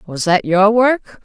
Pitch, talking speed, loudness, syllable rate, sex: 205 Hz, 195 wpm, -14 LUFS, 4.4 syllables/s, female